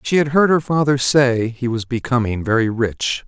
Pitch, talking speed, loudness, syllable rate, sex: 125 Hz, 200 wpm, -18 LUFS, 4.7 syllables/s, male